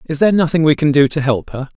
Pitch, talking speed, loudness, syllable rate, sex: 150 Hz, 300 wpm, -14 LUFS, 6.8 syllables/s, male